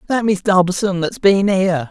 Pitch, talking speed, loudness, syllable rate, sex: 190 Hz, 190 wpm, -16 LUFS, 4.6 syllables/s, male